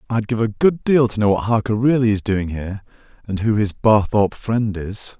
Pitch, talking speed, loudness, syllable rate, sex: 110 Hz, 210 wpm, -18 LUFS, 5.2 syllables/s, male